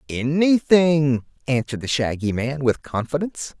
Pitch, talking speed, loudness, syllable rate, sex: 140 Hz, 115 wpm, -21 LUFS, 4.7 syllables/s, male